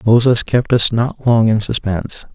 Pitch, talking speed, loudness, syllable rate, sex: 115 Hz, 180 wpm, -15 LUFS, 4.6 syllables/s, male